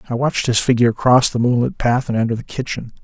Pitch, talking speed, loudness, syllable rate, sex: 120 Hz, 235 wpm, -17 LUFS, 6.6 syllables/s, male